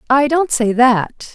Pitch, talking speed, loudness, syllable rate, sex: 255 Hz, 180 wpm, -14 LUFS, 3.5 syllables/s, female